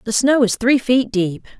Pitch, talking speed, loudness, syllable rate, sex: 230 Hz, 225 wpm, -17 LUFS, 4.5 syllables/s, female